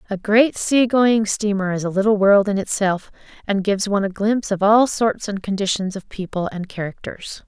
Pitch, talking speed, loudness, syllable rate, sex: 205 Hz, 200 wpm, -19 LUFS, 5.2 syllables/s, female